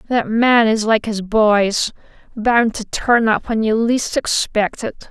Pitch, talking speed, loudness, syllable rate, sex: 225 Hz, 165 wpm, -16 LUFS, 3.6 syllables/s, female